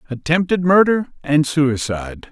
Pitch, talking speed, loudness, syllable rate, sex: 150 Hz, 105 wpm, -17 LUFS, 4.6 syllables/s, male